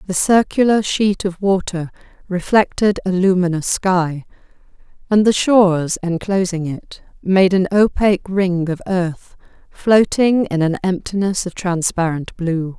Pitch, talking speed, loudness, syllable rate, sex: 185 Hz, 125 wpm, -17 LUFS, 4.1 syllables/s, female